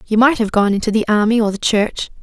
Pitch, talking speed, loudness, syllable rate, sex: 220 Hz, 270 wpm, -16 LUFS, 6.1 syllables/s, female